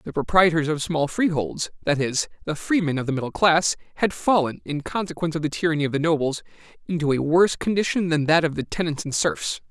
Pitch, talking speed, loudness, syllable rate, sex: 160 Hz, 210 wpm, -22 LUFS, 6.0 syllables/s, male